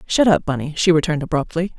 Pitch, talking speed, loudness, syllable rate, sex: 160 Hz, 200 wpm, -18 LUFS, 7.0 syllables/s, female